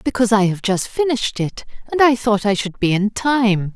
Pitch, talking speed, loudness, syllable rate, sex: 215 Hz, 225 wpm, -18 LUFS, 5.2 syllables/s, female